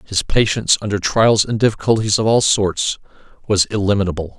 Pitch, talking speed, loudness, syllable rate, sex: 105 Hz, 150 wpm, -16 LUFS, 5.8 syllables/s, male